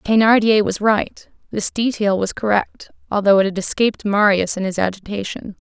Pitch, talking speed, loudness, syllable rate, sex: 205 Hz, 160 wpm, -18 LUFS, 5.1 syllables/s, female